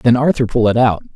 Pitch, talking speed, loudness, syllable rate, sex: 125 Hz, 260 wpm, -14 LUFS, 6.9 syllables/s, male